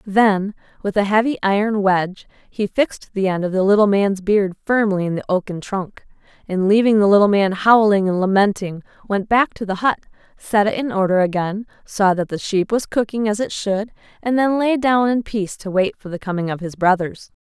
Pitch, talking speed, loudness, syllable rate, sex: 205 Hz, 210 wpm, -18 LUFS, 5.3 syllables/s, female